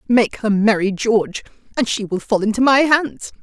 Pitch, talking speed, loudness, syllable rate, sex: 225 Hz, 190 wpm, -17 LUFS, 4.9 syllables/s, female